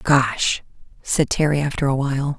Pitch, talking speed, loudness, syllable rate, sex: 140 Hz, 150 wpm, -20 LUFS, 4.6 syllables/s, female